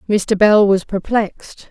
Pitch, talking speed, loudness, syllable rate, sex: 205 Hz, 140 wpm, -15 LUFS, 3.9 syllables/s, female